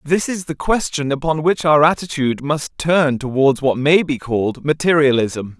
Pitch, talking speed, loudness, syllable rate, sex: 150 Hz, 170 wpm, -17 LUFS, 4.7 syllables/s, male